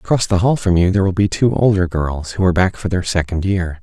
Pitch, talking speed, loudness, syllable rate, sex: 95 Hz, 280 wpm, -16 LUFS, 6.1 syllables/s, male